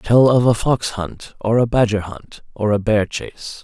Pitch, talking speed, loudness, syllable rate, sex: 110 Hz, 215 wpm, -18 LUFS, 4.4 syllables/s, male